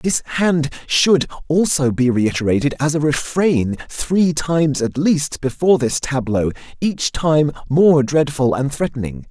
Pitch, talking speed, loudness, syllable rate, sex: 145 Hz, 140 wpm, -17 LUFS, 4.1 syllables/s, male